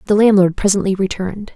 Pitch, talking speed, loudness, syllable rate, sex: 195 Hz, 155 wpm, -15 LUFS, 6.6 syllables/s, female